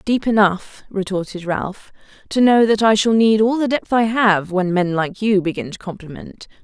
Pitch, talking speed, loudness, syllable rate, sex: 205 Hz, 200 wpm, -17 LUFS, 4.7 syllables/s, female